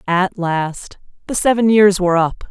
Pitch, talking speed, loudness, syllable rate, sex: 190 Hz, 170 wpm, -16 LUFS, 4.4 syllables/s, female